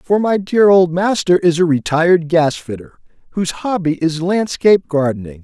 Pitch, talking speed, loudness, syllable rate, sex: 170 Hz, 165 wpm, -15 LUFS, 5.0 syllables/s, male